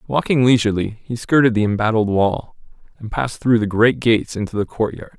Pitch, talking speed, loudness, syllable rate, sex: 115 Hz, 185 wpm, -18 LUFS, 6.0 syllables/s, male